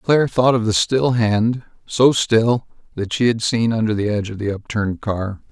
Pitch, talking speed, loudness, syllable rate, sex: 115 Hz, 185 wpm, -18 LUFS, 5.0 syllables/s, male